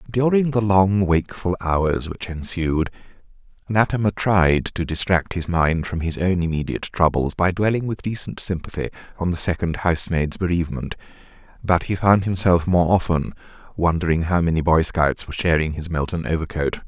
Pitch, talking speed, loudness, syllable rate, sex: 90 Hz, 155 wpm, -21 LUFS, 5.2 syllables/s, male